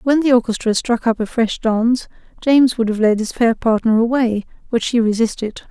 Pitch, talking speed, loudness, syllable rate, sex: 230 Hz, 200 wpm, -17 LUFS, 5.4 syllables/s, female